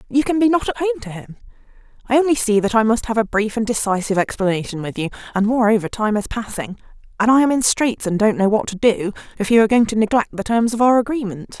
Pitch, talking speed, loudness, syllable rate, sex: 225 Hz, 255 wpm, -18 LUFS, 6.4 syllables/s, female